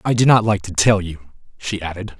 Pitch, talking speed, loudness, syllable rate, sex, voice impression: 100 Hz, 245 wpm, -18 LUFS, 5.4 syllables/s, male, masculine, middle-aged, tensed, powerful, hard, muffled, cool, calm, mature, wild, lively, slightly kind